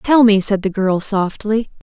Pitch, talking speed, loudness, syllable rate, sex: 210 Hz, 190 wpm, -16 LUFS, 4.1 syllables/s, female